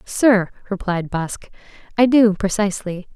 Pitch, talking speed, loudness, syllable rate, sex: 200 Hz, 115 wpm, -19 LUFS, 4.4 syllables/s, female